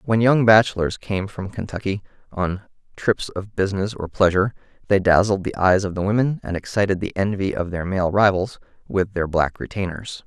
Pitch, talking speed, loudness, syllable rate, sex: 100 Hz, 180 wpm, -21 LUFS, 5.3 syllables/s, male